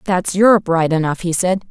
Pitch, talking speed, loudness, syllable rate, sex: 180 Hz, 210 wpm, -15 LUFS, 5.9 syllables/s, female